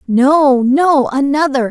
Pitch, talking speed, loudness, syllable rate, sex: 275 Hz, 105 wpm, -12 LUFS, 3.3 syllables/s, female